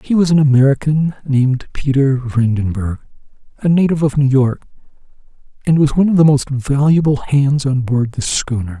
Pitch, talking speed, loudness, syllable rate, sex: 135 Hz, 165 wpm, -15 LUFS, 5.3 syllables/s, male